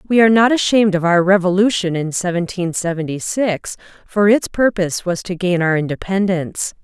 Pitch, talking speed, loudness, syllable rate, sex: 185 Hz, 165 wpm, -17 LUFS, 5.6 syllables/s, female